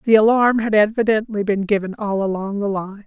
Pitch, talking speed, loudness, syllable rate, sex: 210 Hz, 195 wpm, -18 LUFS, 5.4 syllables/s, female